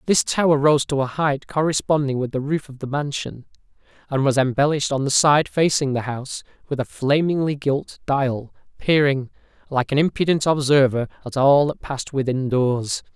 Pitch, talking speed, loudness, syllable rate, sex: 140 Hz, 175 wpm, -20 LUFS, 5.1 syllables/s, male